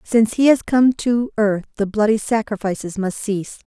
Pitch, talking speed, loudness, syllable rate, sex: 220 Hz, 180 wpm, -19 LUFS, 5.1 syllables/s, female